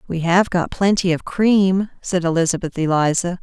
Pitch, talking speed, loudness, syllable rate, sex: 180 Hz, 160 wpm, -18 LUFS, 4.8 syllables/s, female